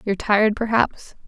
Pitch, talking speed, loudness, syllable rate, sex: 200 Hz, 140 wpm, -20 LUFS, 5.7 syllables/s, female